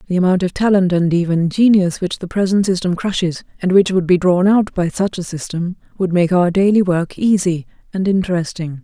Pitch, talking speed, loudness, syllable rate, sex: 180 Hz, 205 wpm, -16 LUFS, 5.4 syllables/s, female